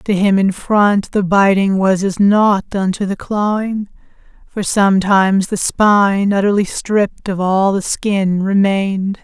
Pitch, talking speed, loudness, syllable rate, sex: 195 Hz, 150 wpm, -15 LUFS, 4.1 syllables/s, female